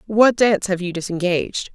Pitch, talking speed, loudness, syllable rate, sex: 195 Hz, 170 wpm, -19 LUFS, 5.6 syllables/s, female